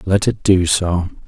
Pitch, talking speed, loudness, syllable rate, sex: 90 Hz, 190 wpm, -16 LUFS, 3.9 syllables/s, male